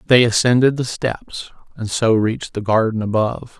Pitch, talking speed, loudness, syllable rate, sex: 115 Hz, 165 wpm, -18 LUFS, 5.1 syllables/s, male